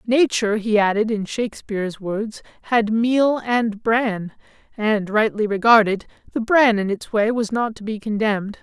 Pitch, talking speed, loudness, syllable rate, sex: 220 Hz, 160 wpm, -20 LUFS, 4.5 syllables/s, male